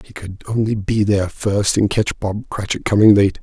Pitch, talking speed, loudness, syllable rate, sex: 100 Hz, 230 wpm, -17 LUFS, 5.2 syllables/s, male